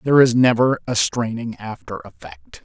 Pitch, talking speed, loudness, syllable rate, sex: 120 Hz, 160 wpm, -18 LUFS, 5.0 syllables/s, male